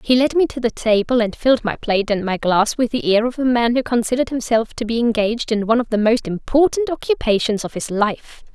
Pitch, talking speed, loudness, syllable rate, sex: 235 Hz, 245 wpm, -18 LUFS, 6.0 syllables/s, female